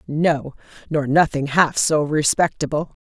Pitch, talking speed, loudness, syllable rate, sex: 150 Hz, 120 wpm, -19 LUFS, 4.1 syllables/s, female